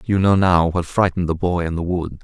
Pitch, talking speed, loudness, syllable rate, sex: 90 Hz, 270 wpm, -19 LUFS, 5.6 syllables/s, male